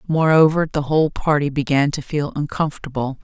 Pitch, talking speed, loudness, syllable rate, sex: 150 Hz, 150 wpm, -19 LUFS, 5.7 syllables/s, female